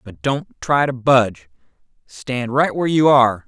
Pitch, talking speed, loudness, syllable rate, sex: 125 Hz, 175 wpm, -17 LUFS, 4.6 syllables/s, male